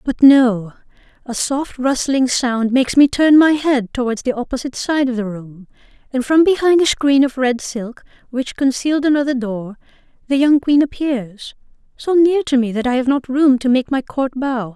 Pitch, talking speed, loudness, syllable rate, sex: 260 Hz, 195 wpm, -16 LUFS, 4.8 syllables/s, female